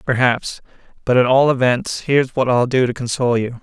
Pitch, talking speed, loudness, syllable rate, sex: 125 Hz, 200 wpm, -17 LUFS, 5.5 syllables/s, male